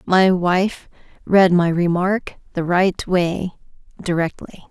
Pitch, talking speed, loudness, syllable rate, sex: 180 Hz, 115 wpm, -18 LUFS, 3.4 syllables/s, female